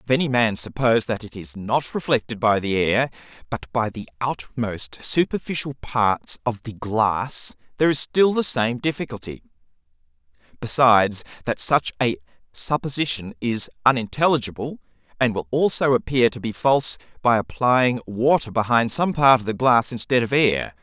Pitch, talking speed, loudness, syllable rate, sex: 120 Hz, 155 wpm, -21 LUFS, 4.9 syllables/s, male